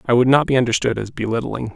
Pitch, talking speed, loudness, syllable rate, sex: 120 Hz, 240 wpm, -18 LUFS, 6.8 syllables/s, male